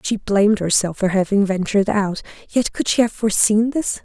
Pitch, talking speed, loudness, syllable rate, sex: 205 Hz, 195 wpm, -18 LUFS, 5.5 syllables/s, female